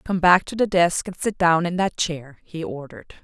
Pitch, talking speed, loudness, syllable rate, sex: 175 Hz, 240 wpm, -21 LUFS, 5.0 syllables/s, female